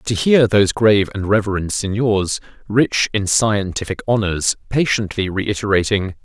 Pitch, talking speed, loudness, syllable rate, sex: 105 Hz, 125 wpm, -17 LUFS, 4.6 syllables/s, male